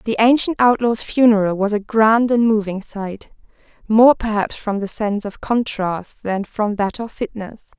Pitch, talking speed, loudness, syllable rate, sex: 215 Hz, 170 wpm, -18 LUFS, 4.4 syllables/s, female